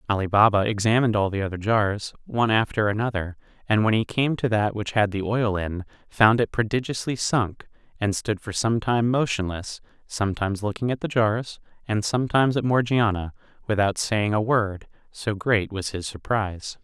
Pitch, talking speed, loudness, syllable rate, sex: 110 Hz, 175 wpm, -23 LUFS, 5.2 syllables/s, male